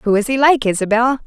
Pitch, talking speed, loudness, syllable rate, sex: 240 Hz, 240 wpm, -15 LUFS, 5.9 syllables/s, female